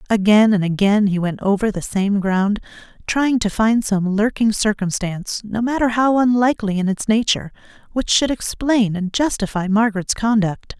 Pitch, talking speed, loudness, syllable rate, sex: 210 Hz, 160 wpm, -18 LUFS, 5.0 syllables/s, female